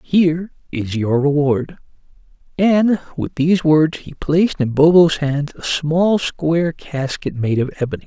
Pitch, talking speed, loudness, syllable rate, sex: 155 Hz, 150 wpm, -17 LUFS, 4.4 syllables/s, male